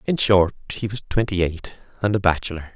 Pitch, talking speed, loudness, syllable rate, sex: 95 Hz, 195 wpm, -22 LUFS, 5.7 syllables/s, male